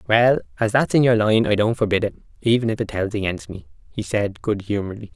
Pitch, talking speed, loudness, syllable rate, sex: 105 Hz, 235 wpm, -20 LUFS, 6.1 syllables/s, male